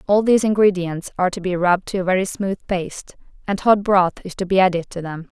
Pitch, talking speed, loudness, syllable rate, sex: 185 Hz, 235 wpm, -19 LUFS, 6.2 syllables/s, female